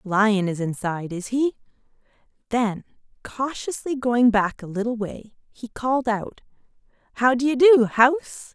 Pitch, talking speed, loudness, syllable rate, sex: 235 Hz, 135 wpm, -22 LUFS, 4.4 syllables/s, female